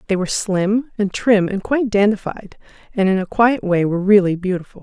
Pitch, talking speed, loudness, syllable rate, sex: 200 Hz, 200 wpm, -17 LUFS, 5.7 syllables/s, female